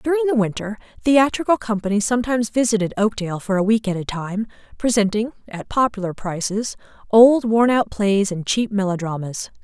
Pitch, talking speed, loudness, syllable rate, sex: 215 Hz, 155 wpm, -20 LUFS, 5.5 syllables/s, female